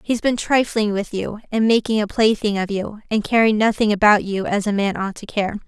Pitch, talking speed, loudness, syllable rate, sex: 210 Hz, 235 wpm, -19 LUFS, 5.3 syllables/s, female